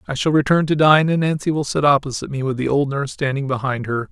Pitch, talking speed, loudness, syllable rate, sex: 140 Hz, 265 wpm, -18 LUFS, 6.6 syllables/s, male